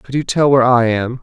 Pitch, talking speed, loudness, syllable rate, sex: 125 Hz, 295 wpm, -14 LUFS, 5.9 syllables/s, male